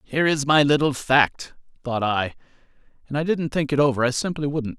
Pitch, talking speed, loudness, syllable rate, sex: 140 Hz, 200 wpm, -21 LUFS, 5.4 syllables/s, male